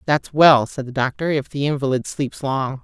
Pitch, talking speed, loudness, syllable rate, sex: 140 Hz, 210 wpm, -19 LUFS, 4.8 syllables/s, female